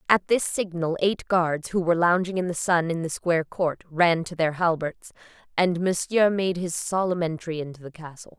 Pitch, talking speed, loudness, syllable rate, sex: 170 Hz, 200 wpm, -24 LUFS, 5.0 syllables/s, female